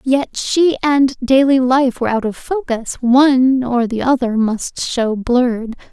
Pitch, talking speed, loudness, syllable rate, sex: 255 Hz, 160 wpm, -15 LUFS, 4.0 syllables/s, female